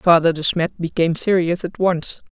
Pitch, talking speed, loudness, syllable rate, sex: 170 Hz, 180 wpm, -19 LUFS, 5.1 syllables/s, female